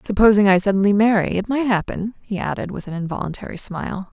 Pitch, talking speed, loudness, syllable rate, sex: 200 Hz, 185 wpm, -20 LUFS, 6.3 syllables/s, female